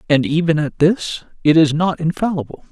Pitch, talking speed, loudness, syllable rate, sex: 160 Hz, 175 wpm, -17 LUFS, 5.2 syllables/s, male